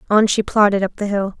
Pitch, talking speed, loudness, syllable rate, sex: 205 Hz, 255 wpm, -17 LUFS, 6.0 syllables/s, female